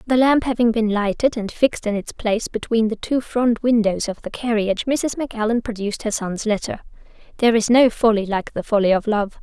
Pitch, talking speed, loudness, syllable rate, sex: 225 Hz, 210 wpm, -20 LUFS, 5.7 syllables/s, female